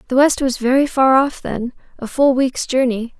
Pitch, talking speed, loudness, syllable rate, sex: 260 Hz, 205 wpm, -16 LUFS, 4.8 syllables/s, female